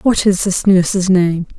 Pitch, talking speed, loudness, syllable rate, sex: 185 Hz, 190 wpm, -14 LUFS, 4.3 syllables/s, female